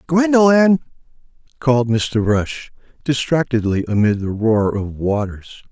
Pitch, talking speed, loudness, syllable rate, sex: 125 Hz, 105 wpm, -17 LUFS, 4.1 syllables/s, male